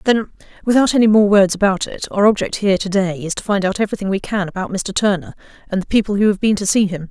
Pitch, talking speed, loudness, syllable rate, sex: 200 Hz, 260 wpm, -17 LUFS, 6.7 syllables/s, female